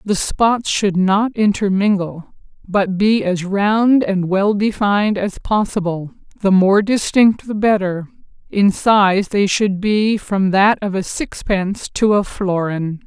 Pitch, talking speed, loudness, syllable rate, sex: 200 Hz, 145 wpm, -16 LUFS, 3.7 syllables/s, female